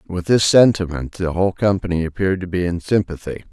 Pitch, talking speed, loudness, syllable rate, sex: 90 Hz, 190 wpm, -18 LUFS, 6.1 syllables/s, male